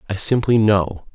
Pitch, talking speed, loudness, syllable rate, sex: 105 Hz, 155 wpm, -17 LUFS, 4.4 syllables/s, male